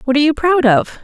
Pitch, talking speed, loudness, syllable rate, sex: 290 Hz, 290 wpm, -13 LUFS, 6.7 syllables/s, female